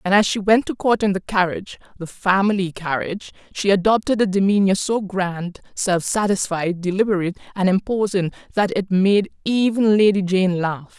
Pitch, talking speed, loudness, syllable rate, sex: 195 Hz, 165 wpm, -19 LUFS, 5.1 syllables/s, female